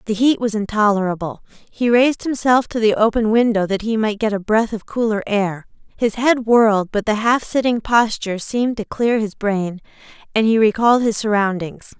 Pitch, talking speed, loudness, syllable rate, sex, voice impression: 220 Hz, 190 wpm, -18 LUFS, 5.2 syllables/s, female, very feminine, young, very thin, tensed, slightly powerful, very bright, very hard, very clear, fluent, very cute, intellectual, very refreshing, slightly sincere, slightly calm, slightly friendly, slightly reassuring, very unique, very elegant, slightly wild, very sweet, very lively, strict, slightly intense, sharp